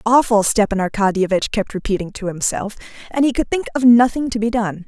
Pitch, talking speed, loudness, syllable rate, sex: 220 Hz, 195 wpm, -18 LUFS, 5.9 syllables/s, female